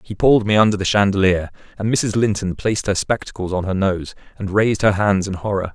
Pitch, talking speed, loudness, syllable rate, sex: 100 Hz, 220 wpm, -18 LUFS, 6.0 syllables/s, male